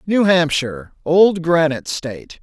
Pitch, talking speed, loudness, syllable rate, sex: 165 Hz, 125 wpm, -16 LUFS, 4.5 syllables/s, male